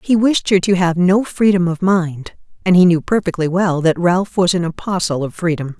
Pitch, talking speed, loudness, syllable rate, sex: 180 Hz, 220 wpm, -16 LUFS, 5.0 syllables/s, female